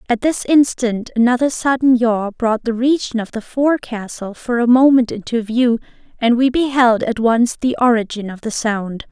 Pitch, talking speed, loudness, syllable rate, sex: 240 Hz, 180 wpm, -16 LUFS, 4.8 syllables/s, female